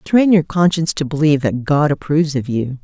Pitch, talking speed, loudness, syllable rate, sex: 150 Hz, 210 wpm, -16 LUFS, 5.9 syllables/s, female